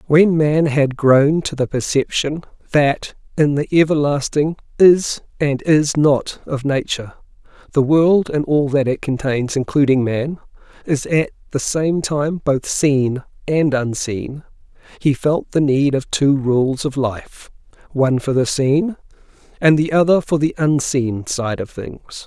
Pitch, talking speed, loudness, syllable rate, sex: 145 Hz, 155 wpm, -17 LUFS, 3.9 syllables/s, male